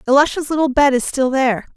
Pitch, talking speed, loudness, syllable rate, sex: 270 Hz, 205 wpm, -16 LUFS, 6.7 syllables/s, female